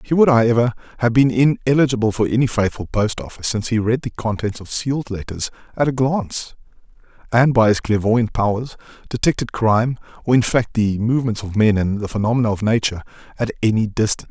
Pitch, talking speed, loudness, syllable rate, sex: 115 Hz, 185 wpm, -19 LUFS, 6.2 syllables/s, male